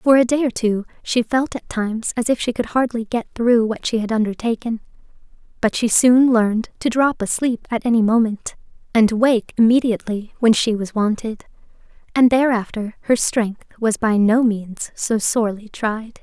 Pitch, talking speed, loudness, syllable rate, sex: 225 Hz, 180 wpm, -19 LUFS, 4.8 syllables/s, female